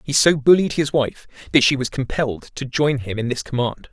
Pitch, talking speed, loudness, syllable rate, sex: 135 Hz, 230 wpm, -19 LUFS, 5.4 syllables/s, male